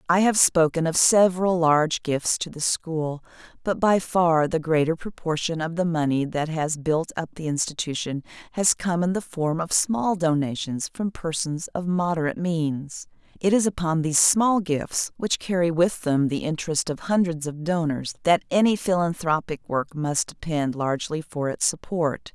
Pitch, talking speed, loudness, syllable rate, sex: 165 Hz, 170 wpm, -23 LUFS, 4.7 syllables/s, female